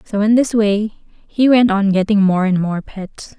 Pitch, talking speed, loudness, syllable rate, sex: 205 Hz, 215 wpm, -15 LUFS, 4.2 syllables/s, female